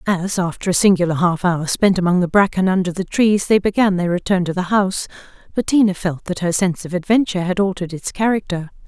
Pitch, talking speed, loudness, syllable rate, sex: 185 Hz, 210 wpm, -18 LUFS, 6.2 syllables/s, female